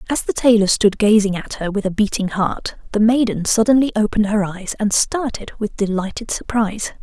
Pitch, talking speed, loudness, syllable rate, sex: 210 Hz, 190 wpm, -18 LUFS, 5.4 syllables/s, female